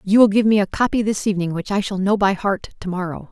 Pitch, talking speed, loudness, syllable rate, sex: 200 Hz, 270 wpm, -19 LUFS, 6.4 syllables/s, female